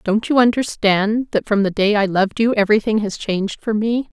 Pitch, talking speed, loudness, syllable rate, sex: 210 Hz, 215 wpm, -18 LUFS, 5.5 syllables/s, female